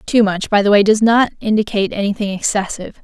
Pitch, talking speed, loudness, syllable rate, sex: 205 Hz, 200 wpm, -15 LUFS, 6.4 syllables/s, female